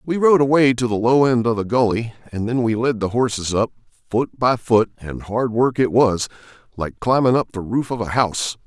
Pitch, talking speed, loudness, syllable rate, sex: 115 Hz, 220 wpm, -19 LUFS, 5.2 syllables/s, male